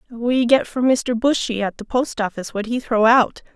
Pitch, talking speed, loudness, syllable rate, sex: 235 Hz, 205 wpm, -19 LUFS, 5.0 syllables/s, female